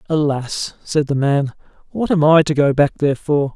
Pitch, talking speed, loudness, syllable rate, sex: 150 Hz, 200 wpm, -17 LUFS, 5.0 syllables/s, male